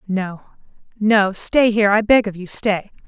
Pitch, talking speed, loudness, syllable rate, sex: 205 Hz, 175 wpm, -17 LUFS, 4.4 syllables/s, female